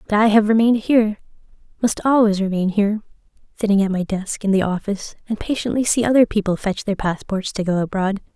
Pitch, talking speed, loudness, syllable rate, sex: 205 Hz, 185 wpm, -19 LUFS, 6.2 syllables/s, female